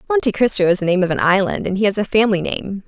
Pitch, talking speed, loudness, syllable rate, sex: 200 Hz, 295 wpm, -17 LUFS, 7.1 syllables/s, female